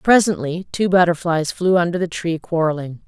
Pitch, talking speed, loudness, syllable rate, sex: 170 Hz, 155 wpm, -19 LUFS, 5.2 syllables/s, female